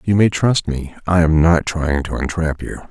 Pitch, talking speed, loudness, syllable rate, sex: 85 Hz, 225 wpm, -17 LUFS, 4.4 syllables/s, male